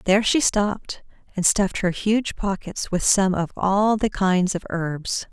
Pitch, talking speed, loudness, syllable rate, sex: 195 Hz, 180 wpm, -21 LUFS, 4.2 syllables/s, female